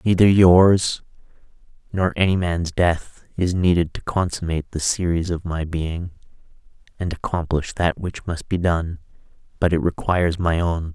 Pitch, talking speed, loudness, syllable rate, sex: 85 Hz, 150 wpm, -21 LUFS, 4.5 syllables/s, male